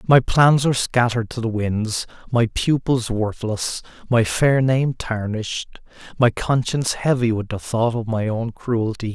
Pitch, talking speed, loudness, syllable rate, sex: 115 Hz, 155 wpm, -20 LUFS, 4.4 syllables/s, male